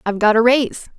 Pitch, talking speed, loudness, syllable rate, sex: 230 Hz, 245 wpm, -15 LUFS, 7.9 syllables/s, female